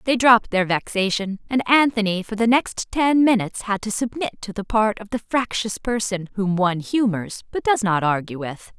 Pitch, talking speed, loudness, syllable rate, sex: 215 Hz, 200 wpm, -21 LUFS, 5.0 syllables/s, female